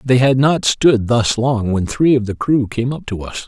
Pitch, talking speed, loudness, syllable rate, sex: 120 Hz, 260 wpm, -16 LUFS, 4.5 syllables/s, male